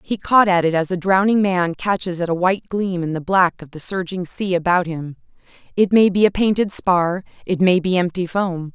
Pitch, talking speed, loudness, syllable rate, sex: 180 Hz, 220 wpm, -18 LUFS, 5.1 syllables/s, female